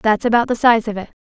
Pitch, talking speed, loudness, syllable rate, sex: 225 Hz, 295 wpm, -16 LUFS, 6.3 syllables/s, female